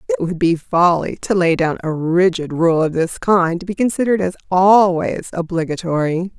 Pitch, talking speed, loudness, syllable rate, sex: 175 Hz, 180 wpm, -17 LUFS, 5.0 syllables/s, female